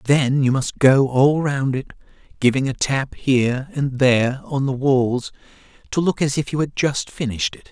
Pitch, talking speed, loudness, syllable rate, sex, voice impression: 135 Hz, 195 wpm, -19 LUFS, 4.7 syllables/s, male, masculine, middle-aged, slightly bright, halting, raspy, sincere, slightly mature, friendly, kind, modest